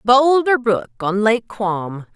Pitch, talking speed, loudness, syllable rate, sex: 225 Hz, 140 wpm, -17 LUFS, 3.3 syllables/s, female